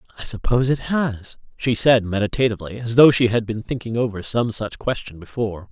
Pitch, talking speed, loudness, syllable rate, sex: 115 Hz, 190 wpm, -20 LUFS, 5.9 syllables/s, male